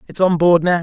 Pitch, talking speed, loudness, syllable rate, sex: 175 Hz, 360 wpm, -15 LUFS, 7.7 syllables/s, male